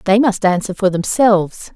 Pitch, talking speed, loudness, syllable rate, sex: 200 Hz, 170 wpm, -15 LUFS, 5.0 syllables/s, female